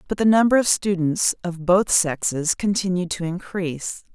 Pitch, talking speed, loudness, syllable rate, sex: 180 Hz, 160 wpm, -21 LUFS, 4.8 syllables/s, female